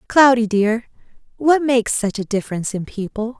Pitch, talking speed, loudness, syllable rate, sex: 230 Hz, 160 wpm, -18 LUFS, 5.6 syllables/s, female